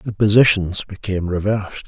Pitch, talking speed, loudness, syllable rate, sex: 100 Hz, 130 wpm, -18 LUFS, 5.5 syllables/s, male